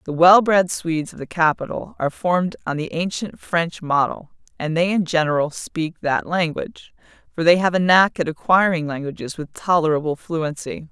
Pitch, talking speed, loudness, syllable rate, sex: 165 Hz, 175 wpm, -20 LUFS, 5.1 syllables/s, female